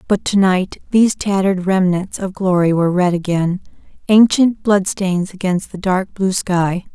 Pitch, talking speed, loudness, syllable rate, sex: 190 Hz, 155 wpm, -16 LUFS, 4.6 syllables/s, female